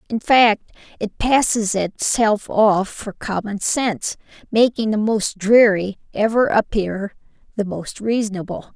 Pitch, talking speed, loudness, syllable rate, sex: 210 Hz, 125 wpm, -19 LUFS, 4.0 syllables/s, female